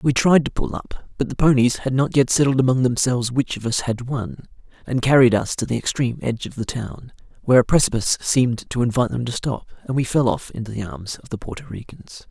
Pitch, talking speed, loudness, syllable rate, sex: 125 Hz, 240 wpm, -20 LUFS, 6.0 syllables/s, male